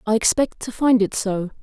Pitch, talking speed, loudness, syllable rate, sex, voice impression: 220 Hz, 220 wpm, -20 LUFS, 5.0 syllables/s, female, feminine, slightly adult-like, cute, slightly refreshing, slightly calm, slightly kind